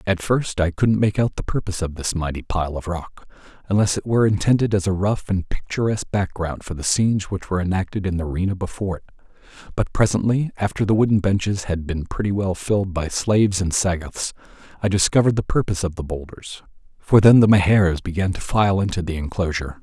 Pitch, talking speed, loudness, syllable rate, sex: 95 Hz, 205 wpm, -21 LUFS, 6.1 syllables/s, male